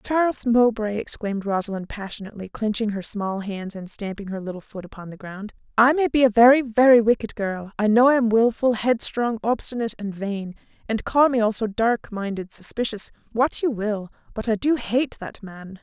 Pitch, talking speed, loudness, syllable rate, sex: 220 Hz, 185 wpm, -22 LUFS, 5.2 syllables/s, female